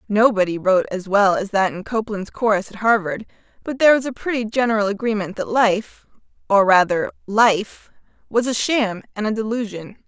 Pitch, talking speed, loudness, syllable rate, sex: 210 Hz, 160 wpm, -19 LUFS, 5.3 syllables/s, female